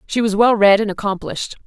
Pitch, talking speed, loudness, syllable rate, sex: 205 Hz, 215 wpm, -16 LUFS, 6.3 syllables/s, female